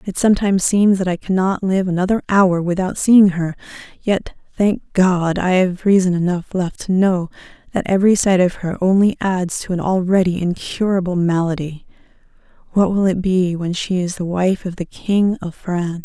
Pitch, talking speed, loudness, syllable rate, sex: 185 Hz, 185 wpm, -17 LUFS, 4.9 syllables/s, female